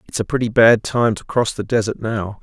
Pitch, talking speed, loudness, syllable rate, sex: 110 Hz, 245 wpm, -18 LUFS, 5.2 syllables/s, male